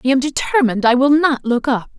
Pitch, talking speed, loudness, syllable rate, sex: 265 Hz, 240 wpm, -16 LUFS, 6.2 syllables/s, female